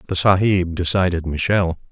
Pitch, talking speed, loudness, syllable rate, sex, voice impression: 90 Hz, 125 wpm, -18 LUFS, 5.6 syllables/s, male, masculine, adult-like, tensed, slightly dark, fluent, intellectual, calm, reassuring, wild, modest